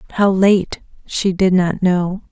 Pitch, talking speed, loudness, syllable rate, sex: 185 Hz, 155 wpm, -16 LUFS, 3.6 syllables/s, female